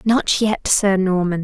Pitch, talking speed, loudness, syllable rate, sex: 195 Hz, 170 wpm, -17 LUFS, 3.6 syllables/s, female